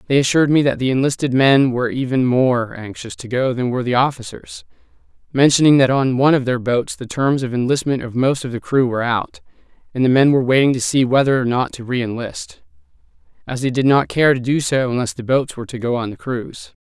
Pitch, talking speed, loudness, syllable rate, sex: 130 Hz, 230 wpm, -17 LUFS, 6.0 syllables/s, male